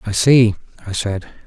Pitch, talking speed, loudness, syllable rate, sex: 110 Hz, 165 wpm, -16 LUFS, 4.4 syllables/s, male